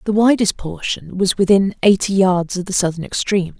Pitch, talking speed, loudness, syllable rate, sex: 190 Hz, 185 wpm, -17 LUFS, 5.3 syllables/s, female